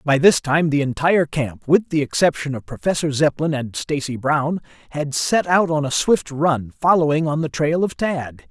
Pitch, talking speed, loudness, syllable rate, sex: 150 Hz, 200 wpm, -19 LUFS, 4.7 syllables/s, male